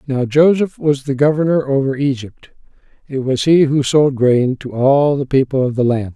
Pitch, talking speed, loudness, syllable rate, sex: 140 Hz, 195 wpm, -15 LUFS, 4.8 syllables/s, male